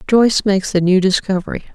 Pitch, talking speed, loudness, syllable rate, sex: 195 Hz, 170 wpm, -15 LUFS, 6.5 syllables/s, female